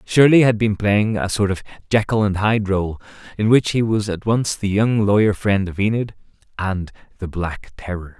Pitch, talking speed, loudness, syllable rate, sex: 105 Hz, 200 wpm, -19 LUFS, 4.9 syllables/s, male